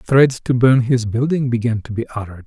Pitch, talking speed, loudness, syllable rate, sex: 120 Hz, 220 wpm, -17 LUFS, 5.8 syllables/s, male